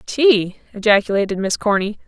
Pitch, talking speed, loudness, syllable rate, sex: 210 Hz, 115 wpm, -17 LUFS, 5.1 syllables/s, female